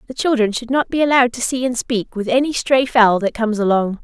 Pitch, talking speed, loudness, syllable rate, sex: 240 Hz, 255 wpm, -17 LUFS, 6.0 syllables/s, female